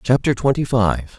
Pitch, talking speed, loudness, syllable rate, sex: 120 Hz, 150 wpm, -18 LUFS, 4.4 syllables/s, male